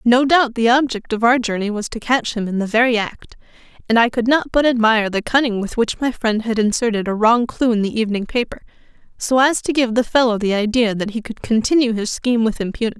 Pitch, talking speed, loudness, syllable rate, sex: 230 Hz, 240 wpm, -17 LUFS, 6.1 syllables/s, female